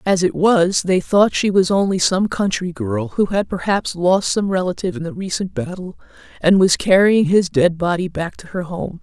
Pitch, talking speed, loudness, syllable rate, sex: 185 Hz, 205 wpm, -17 LUFS, 4.8 syllables/s, female